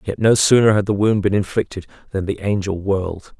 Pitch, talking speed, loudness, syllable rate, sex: 100 Hz, 210 wpm, -18 LUFS, 5.6 syllables/s, male